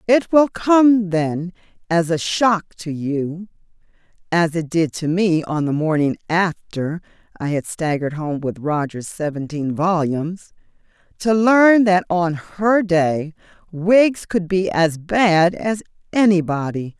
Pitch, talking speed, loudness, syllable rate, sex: 175 Hz, 140 wpm, -18 LUFS, 3.5 syllables/s, female